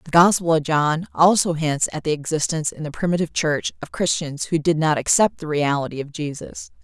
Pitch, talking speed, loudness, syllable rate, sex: 160 Hz, 200 wpm, -20 LUFS, 5.6 syllables/s, female